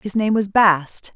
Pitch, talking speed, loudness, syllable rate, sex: 200 Hz, 210 wpm, -17 LUFS, 3.6 syllables/s, female